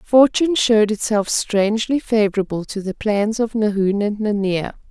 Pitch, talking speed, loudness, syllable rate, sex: 215 Hz, 145 wpm, -18 LUFS, 4.8 syllables/s, female